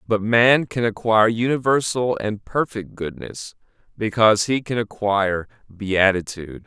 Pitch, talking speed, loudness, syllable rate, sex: 110 Hz, 115 wpm, -20 LUFS, 4.6 syllables/s, male